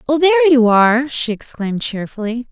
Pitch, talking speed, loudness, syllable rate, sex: 240 Hz, 165 wpm, -15 LUFS, 5.5 syllables/s, female